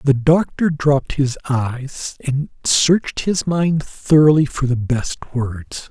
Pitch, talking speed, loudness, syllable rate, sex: 140 Hz, 140 wpm, -18 LUFS, 3.5 syllables/s, male